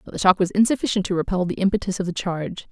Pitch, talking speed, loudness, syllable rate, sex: 190 Hz, 265 wpm, -22 LUFS, 7.4 syllables/s, female